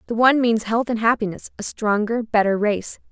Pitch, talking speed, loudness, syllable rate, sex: 220 Hz, 175 wpm, -20 LUFS, 5.4 syllables/s, female